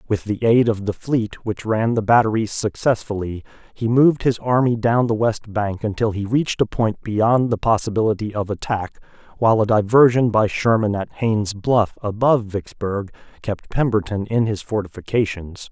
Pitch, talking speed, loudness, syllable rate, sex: 110 Hz, 170 wpm, -20 LUFS, 5.0 syllables/s, male